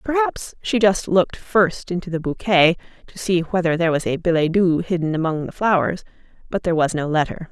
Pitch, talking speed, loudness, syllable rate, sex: 175 Hz, 200 wpm, -20 LUFS, 5.6 syllables/s, female